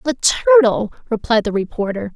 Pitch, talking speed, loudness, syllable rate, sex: 215 Hz, 140 wpm, -17 LUFS, 4.8 syllables/s, female